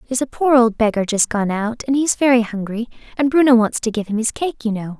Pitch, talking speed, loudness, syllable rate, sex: 235 Hz, 240 wpm, -18 LUFS, 6.0 syllables/s, female